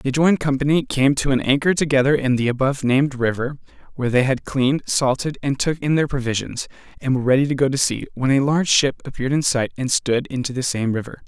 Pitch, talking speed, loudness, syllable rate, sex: 135 Hz, 230 wpm, -20 LUFS, 6.3 syllables/s, male